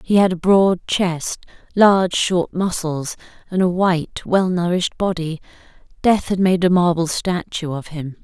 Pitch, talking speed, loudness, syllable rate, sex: 175 Hz, 160 wpm, -18 LUFS, 4.4 syllables/s, female